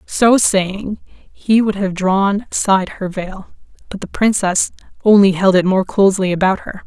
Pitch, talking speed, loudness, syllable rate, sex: 195 Hz, 165 wpm, -15 LUFS, 4.4 syllables/s, female